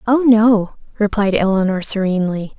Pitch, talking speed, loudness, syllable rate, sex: 205 Hz, 115 wpm, -16 LUFS, 5.0 syllables/s, female